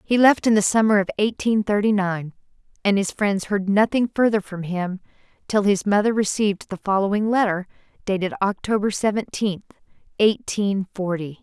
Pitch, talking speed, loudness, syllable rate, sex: 205 Hz, 150 wpm, -21 LUFS, 5.1 syllables/s, female